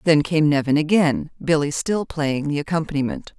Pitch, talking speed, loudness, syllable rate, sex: 155 Hz, 160 wpm, -21 LUFS, 5.0 syllables/s, female